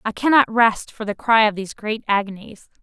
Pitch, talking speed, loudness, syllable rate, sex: 220 Hz, 210 wpm, -19 LUFS, 5.4 syllables/s, female